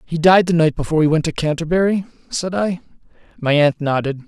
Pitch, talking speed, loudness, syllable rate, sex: 165 Hz, 195 wpm, -17 LUFS, 6.0 syllables/s, male